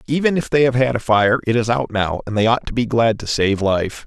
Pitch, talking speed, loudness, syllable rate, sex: 115 Hz, 295 wpm, -18 LUFS, 5.6 syllables/s, male